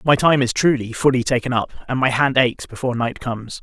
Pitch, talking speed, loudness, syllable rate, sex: 125 Hz, 230 wpm, -19 LUFS, 6.0 syllables/s, male